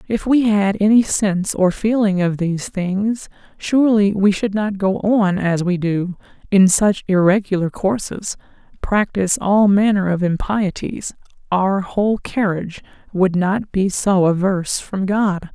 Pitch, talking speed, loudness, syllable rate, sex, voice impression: 195 Hz, 145 wpm, -17 LUFS, 4.3 syllables/s, female, feminine, gender-neutral, very adult-like, very middle-aged, slightly thin, slightly relaxed, slightly weak, slightly bright, very soft, muffled, slightly halting, slightly cool, very intellectual, very sincere, very calm, slightly mature, friendly, very reassuring, very unique, very elegant, slightly wild, slightly lively, very kind, slightly light